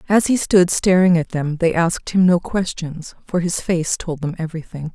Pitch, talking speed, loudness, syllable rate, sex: 170 Hz, 205 wpm, -18 LUFS, 5.1 syllables/s, female